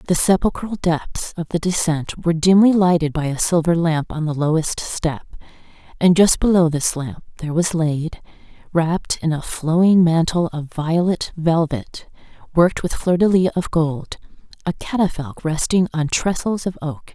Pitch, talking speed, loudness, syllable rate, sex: 165 Hz, 165 wpm, -19 LUFS, 4.7 syllables/s, female